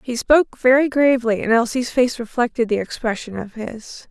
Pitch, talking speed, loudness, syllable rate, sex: 240 Hz, 175 wpm, -18 LUFS, 5.2 syllables/s, female